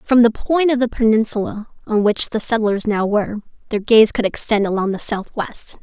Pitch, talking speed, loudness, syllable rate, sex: 220 Hz, 195 wpm, -17 LUFS, 5.1 syllables/s, female